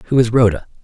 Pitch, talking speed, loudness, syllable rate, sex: 115 Hz, 215 wpm, -15 LUFS, 8.2 syllables/s, male